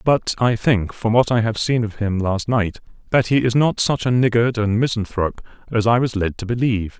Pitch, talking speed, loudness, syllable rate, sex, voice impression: 115 Hz, 230 wpm, -19 LUFS, 5.3 syllables/s, male, masculine, very adult-like, cool, calm, slightly mature, sweet